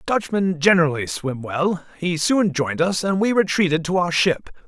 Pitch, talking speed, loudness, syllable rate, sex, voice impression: 175 Hz, 180 wpm, -20 LUFS, 5.0 syllables/s, male, very masculine, middle-aged, slightly thick, slightly powerful, cool, wild, slightly intense